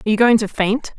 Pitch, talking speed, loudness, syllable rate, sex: 220 Hz, 305 wpm, -17 LUFS, 7.1 syllables/s, female